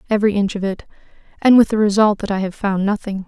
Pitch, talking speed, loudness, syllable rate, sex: 205 Hz, 240 wpm, -17 LUFS, 6.7 syllables/s, female